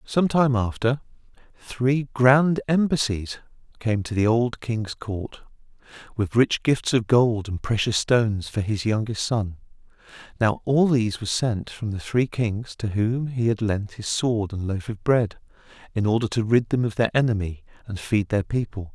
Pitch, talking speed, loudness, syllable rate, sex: 115 Hz, 175 wpm, -23 LUFS, 4.4 syllables/s, male